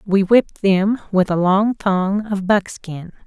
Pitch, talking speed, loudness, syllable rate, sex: 195 Hz, 165 wpm, -17 LUFS, 3.9 syllables/s, female